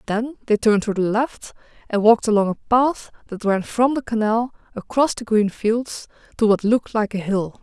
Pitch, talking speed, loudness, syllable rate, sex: 220 Hz, 205 wpm, -20 LUFS, 5.1 syllables/s, female